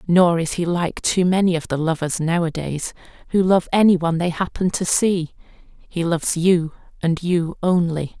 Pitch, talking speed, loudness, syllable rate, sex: 170 Hz, 175 wpm, -20 LUFS, 4.6 syllables/s, female